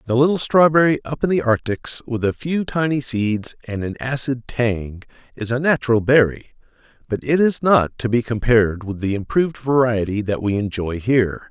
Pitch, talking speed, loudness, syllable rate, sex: 120 Hz, 185 wpm, -19 LUFS, 5.1 syllables/s, male